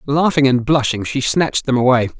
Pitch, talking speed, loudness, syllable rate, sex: 130 Hz, 190 wpm, -16 LUFS, 5.6 syllables/s, male